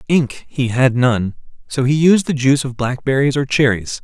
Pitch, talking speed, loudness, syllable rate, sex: 130 Hz, 195 wpm, -16 LUFS, 4.9 syllables/s, male